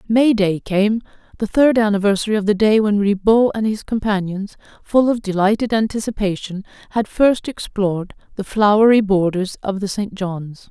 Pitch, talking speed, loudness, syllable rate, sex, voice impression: 205 Hz, 155 wpm, -18 LUFS, 4.9 syllables/s, female, very feminine, middle-aged, thin, tensed, slightly weak, slightly dark, slightly hard, clear, fluent, slightly cute, intellectual, very refreshing, sincere, calm, friendly, reassuring, unique, very elegant, sweet, slightly lively, slightly strict, slightly intense, sharp